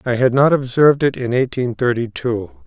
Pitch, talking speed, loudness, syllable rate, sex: 125 Hz, 200 wpm, -17 LUFS, 5.4 syllables/s, male